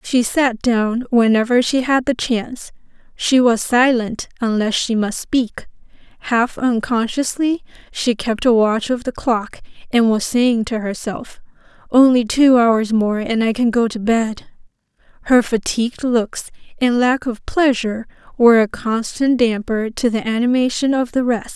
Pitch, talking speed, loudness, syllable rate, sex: 235 Hz, 155 wpm, -17 LUFS, 4.3 syllables/s, female